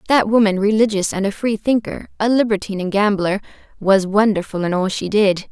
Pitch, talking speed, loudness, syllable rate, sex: 205 Hz, 185 wpm, -18 LUFS, 5.6 syllables/s, female